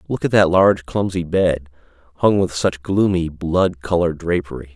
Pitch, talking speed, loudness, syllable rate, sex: 90 Hz, 165 wpm, -18 LUFS, 4.9 syllables/s, male